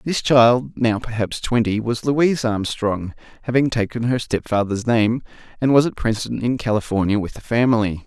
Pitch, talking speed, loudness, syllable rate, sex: 115 Hz, 165 wpm, -20 LUFS, 5.0 syllables/s, male